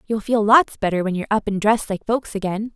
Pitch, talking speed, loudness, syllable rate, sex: 210 Hz, 260 wpm, -20 LUFS, 6.4 syllables/s, female